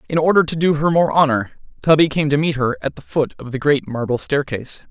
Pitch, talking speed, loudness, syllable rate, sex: 145 Hz, 245 wpm, -18 LUFS, 5.9 syllables/s, male